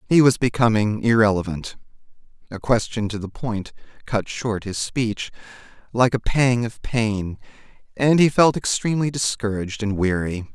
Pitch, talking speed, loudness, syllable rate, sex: 115 Hz, 140 wpm, -21 LUFS, 4.7 syllables/s, male